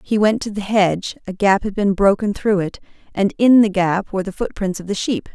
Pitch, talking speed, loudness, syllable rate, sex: 200 Hz, 245 wpm, -18 LUFS, 5.5 syllables/s, female